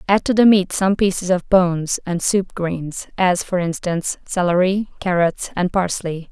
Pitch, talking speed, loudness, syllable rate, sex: 180 Hz, 170 wpm, -19 LUFS, 4.5 syllables/s, female